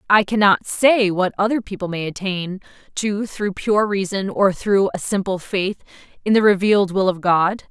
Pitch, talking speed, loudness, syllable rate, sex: 195 Hz, 180 wpm, -19 LUFS, 4.7 syllables/s, female